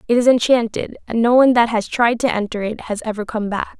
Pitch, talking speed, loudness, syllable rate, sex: 230 Hz, 255 wpm, -17 LUFS, 6.0 syllables/s, female